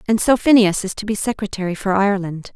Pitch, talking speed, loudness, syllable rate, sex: 205 Hz, 210 wpm, -18 LUFS, 6.3 syllables/s, female